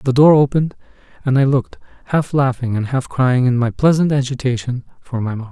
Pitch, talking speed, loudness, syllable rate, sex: 130 Hz, 195 wpm, -17 LUFS, 6.0 syllables/s, male